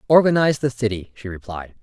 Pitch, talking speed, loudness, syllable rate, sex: 120 Hz, 165 wpm, -20 LUFS, 6.3 syllables/s, male